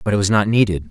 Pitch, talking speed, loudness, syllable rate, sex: 100 Hz, 330 wpm, -17 LUFS, 7.4 syllables/s, male